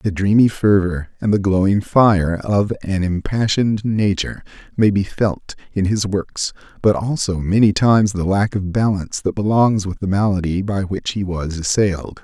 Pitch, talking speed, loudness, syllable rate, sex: 100 Hz, 170 wpm, -18 LUFS, 4.7 syllables/s, male